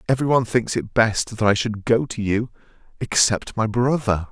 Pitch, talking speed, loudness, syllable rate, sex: 115 Hz, 195 wpm, -20 LUFS, 5.2 syllables/s, male